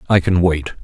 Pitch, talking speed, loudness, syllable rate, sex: 85 Hz, 215 wpm, -16 LUFS, 5.8 syllables/s, male